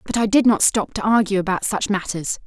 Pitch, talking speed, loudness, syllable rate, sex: 205 Hz, 245 wpm, -19 LUFS, 5.7 syllables/s, female